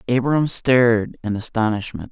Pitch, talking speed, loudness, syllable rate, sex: 115 Hz, 115 wpm, -19 LUFS, 4.7 syllables/s, male